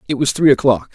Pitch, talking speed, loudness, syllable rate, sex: 135 Hz, 255 wpm, -15 LUFS, 6.7 syllables/s, male